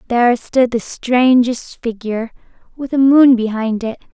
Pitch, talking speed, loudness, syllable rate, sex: 240 Hz, 145 wpm, -15 LUFS, 4.4 syllables/s, female